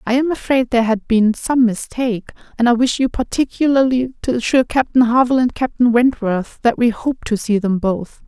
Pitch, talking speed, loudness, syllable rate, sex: 240 Hz, 195 wpm, -17 LUFS, 5.4 syllables/s, female